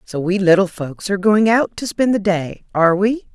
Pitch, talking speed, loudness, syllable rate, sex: 195 Hz, 235 wpm, -17 LUFS, 5.1 syllables/s, female